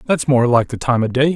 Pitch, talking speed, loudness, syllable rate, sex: 130 Hz, 310 wpm, -16 LUFS, 6.0 syllables/s, male